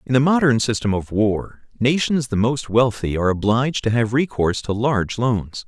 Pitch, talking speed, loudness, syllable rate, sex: 120 Hz, 190 wpm, -20 LUFS, 5.2 syllables/s, male